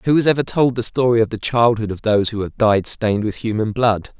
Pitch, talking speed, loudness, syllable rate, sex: 115 Hz, 255 wpm, -18 LUFS, 5.9 syllables/s, male